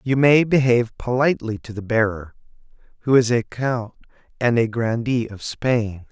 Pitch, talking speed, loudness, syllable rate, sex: 120 Hz, 155 wpm, -20 LUFS, 4.8 syllables/s, male